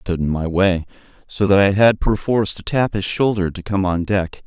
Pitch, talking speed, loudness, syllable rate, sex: 95 Hz, 240 wpm, -18 LUFS, 5.4 syllables/s, male